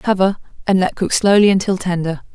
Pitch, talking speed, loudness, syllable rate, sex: 190 Hz, 180 wpm, -16 LUFS, 5.6 syllables/s, female